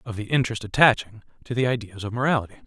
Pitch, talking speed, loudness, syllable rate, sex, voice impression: 115 Hz, 200 wpm, -23 LUFS, 7.6 syllables/s, male, masculine, middle-aged, tensed, slightly powerful, bright, clear, fluent, cool, intellectual, calm, friendly, slightly reassuring, wild, slightly strict